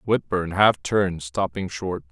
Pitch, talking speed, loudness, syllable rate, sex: 95 Hz, 140 wpm, -23 LUFS, 4.2 syllables/s, male